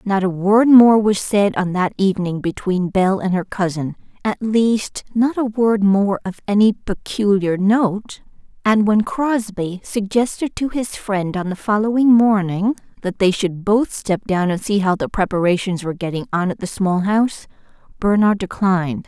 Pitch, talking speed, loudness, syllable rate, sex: 200 Hz, 175 wpm, -18 LUFS, 4.5 syllables/s, female